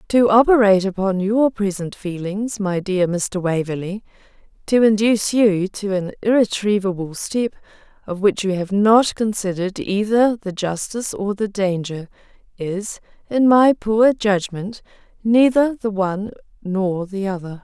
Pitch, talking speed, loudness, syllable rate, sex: 200 Hz, 135 wpm, -19 LUFS, 4.4 syllables/s, female